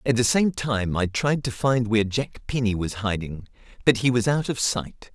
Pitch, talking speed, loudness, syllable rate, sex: 115 Hz, 220 wpm, -23 LUFS, 4.7 syllables/s, male